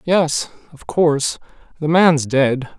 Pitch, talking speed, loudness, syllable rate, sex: 150 Hz, 130 wpm, -17 LUFS, 3.5 syllables/s, male